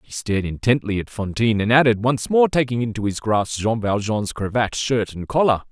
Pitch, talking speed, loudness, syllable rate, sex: 115 Hz, 200 wpm, -20 LUFS, 5.4 syllables/s, male